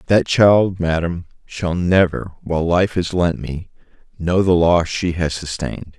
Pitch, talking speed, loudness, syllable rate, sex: 85 Hz, 160 wpm, -18 LUFS, 4.2 syllables/s, male